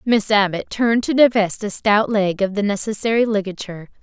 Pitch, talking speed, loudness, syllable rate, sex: 210 Hz, 180 wpm, -18 LUFS, 5.5 syllables/s, female